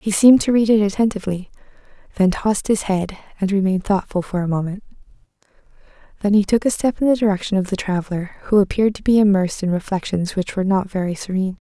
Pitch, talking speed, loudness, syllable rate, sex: 195 Hz, 200 wpm, -19 LUFS, 6.9 syllables/s, female